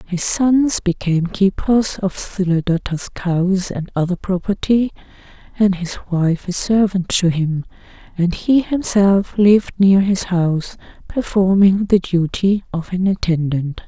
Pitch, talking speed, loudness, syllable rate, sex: 190 Hz, 130 wpm, -17 LUFS, 4.0 syllables/s, female